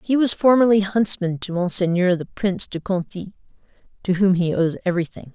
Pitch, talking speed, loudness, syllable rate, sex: 190 Hz, 170 wpm, -20 LUFS, 5.6 syllables/s, female